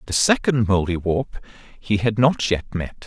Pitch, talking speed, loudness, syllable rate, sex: 110 Hz, 155 wpm, -20 LUFS, 4.4 syllables/s, male